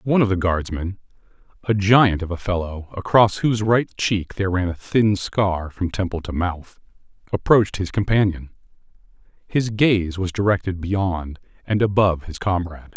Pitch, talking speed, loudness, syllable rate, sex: 95 Hz, 155 wpm, -21 LUFS, 4.8 syllables/s, male